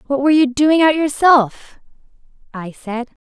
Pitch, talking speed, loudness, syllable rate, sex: 275 Hz, 145 wpm, -15 LUFS, 4.7 syllables/s, female